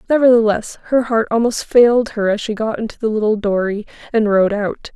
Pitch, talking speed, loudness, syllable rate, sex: 220 Hz, 195 wpm, -16 LUFS, 5.8 syllables/s, female